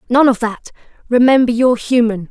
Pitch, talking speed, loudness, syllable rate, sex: 240 Hz, 155 wpm, -14 LUFS, 5.8 syllables/s, female